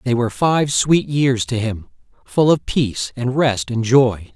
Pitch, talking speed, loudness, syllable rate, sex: 130 Hz, 195 wpm, -18 LUFS, 4.2 syllables/s, male